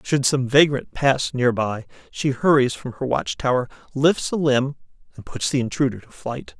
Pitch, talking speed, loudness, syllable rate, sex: 135 Hz, 190 wpm, -21 LUFS, 4.7 syllables/s, male